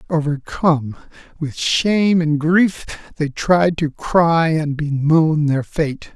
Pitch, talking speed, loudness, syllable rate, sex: 155 Hz, 125 wpm, -17 LUFS, 3.5 syllables/s, male